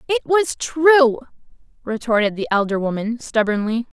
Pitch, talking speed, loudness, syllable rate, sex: 245 Hz, 120 wpm, -18 LUFS, 5.3 syllables/s, female